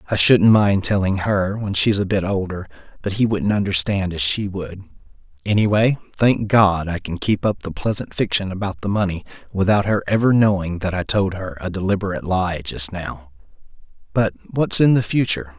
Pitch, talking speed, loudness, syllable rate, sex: 100 Hz, 175 wpm, -19 LUFS, 5.1 syllables/s, male